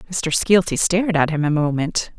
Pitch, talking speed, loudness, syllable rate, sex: 165 Hz, 190 wpm, -19 LUFS, 5.1 syllables/s, female